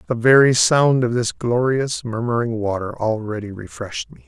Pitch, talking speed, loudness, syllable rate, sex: 110 Hz, 155 wpm, -19 LUFS, 4.9 syllables/s, male